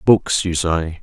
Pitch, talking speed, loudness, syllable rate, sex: 85 Hz, 175 wpm, -18 LUFS, 3.5 syllables/s, male